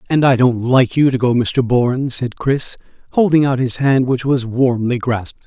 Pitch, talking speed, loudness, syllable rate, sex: 125 Hz, 210 wpm, -16 LUFS, 4.7 syllables/s, male